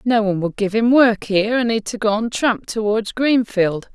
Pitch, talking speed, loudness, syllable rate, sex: 220 Hz, 230 wpm, -18 LUFS, 5.0 syllables/s, female